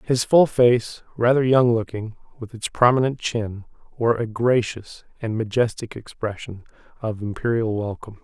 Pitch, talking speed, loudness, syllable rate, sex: 115 Hz, 140 wpm, -21 LUFS, 4.6 syllables/s, male